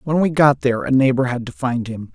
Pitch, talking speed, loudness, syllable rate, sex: 130 Hz, 280 wpm, -18 LUFS, 5.9 syllables/s, male